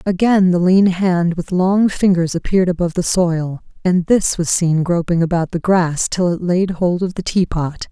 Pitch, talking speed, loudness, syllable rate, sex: 175 Hz, 195 wpm, -16 LUFS, 4.6 syllables/s, female